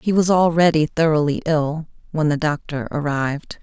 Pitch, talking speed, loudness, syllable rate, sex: 155 Hz, 150 wpm, -19 LUFS, 4.9 syllables/s, female